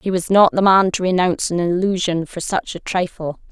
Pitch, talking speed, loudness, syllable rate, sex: 180 Hz, 220 wpm, -18 LUFS, 5.3 syllables/s, female